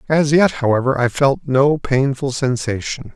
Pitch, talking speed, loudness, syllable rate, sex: 135 Hz, 150 wpm, -17 LUFS, 4.4 syllables/s, male